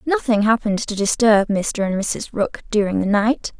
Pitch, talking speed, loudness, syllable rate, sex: 215 Hz, 185 wpm, -19 LUFS, 4.7 syllables/s, female